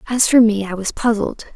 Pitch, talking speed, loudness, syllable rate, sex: 215 Hz, 230 wpm, -17 LUFS, 5.5 syllables/s, female